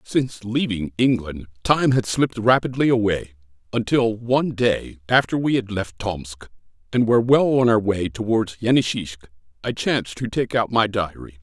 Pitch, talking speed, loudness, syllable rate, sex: 110 Hz, 165 wpm, -21 LUFS, 4.8 syllables/s, male